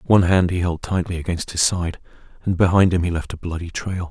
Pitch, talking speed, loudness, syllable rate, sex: 90 Hz, 235 wpm, -20 LUFS, 6.0 syllables/s, male